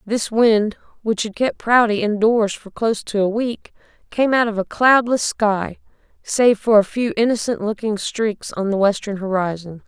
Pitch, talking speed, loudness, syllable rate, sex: 215 Hz, 175 wpm, -19 LUFS, 4.5 syllables/s, female